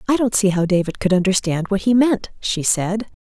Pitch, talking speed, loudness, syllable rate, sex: 200 Hz, 225 wpm, -18 LUFS, 5.3 syllables/s, female